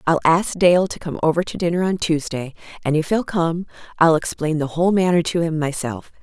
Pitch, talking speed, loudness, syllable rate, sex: 165 Hz, 210 wpm, -20 LUFS, 5.4 syllables/s, female